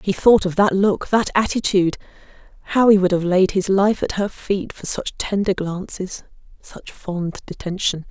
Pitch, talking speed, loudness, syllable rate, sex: 190 Hz, 170 wpm, -19 LUFS, 4.6 syllables/s, female